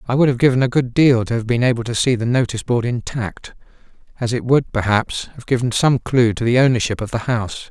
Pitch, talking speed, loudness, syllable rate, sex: 120 Hz, 240 wpm, -18 LUFS, 6.0 syllables/s, male